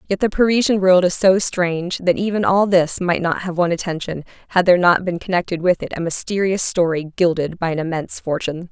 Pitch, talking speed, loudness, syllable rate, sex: 175 Hz, 215 wpm, -18 LUFS, 5.9 syllables/s, female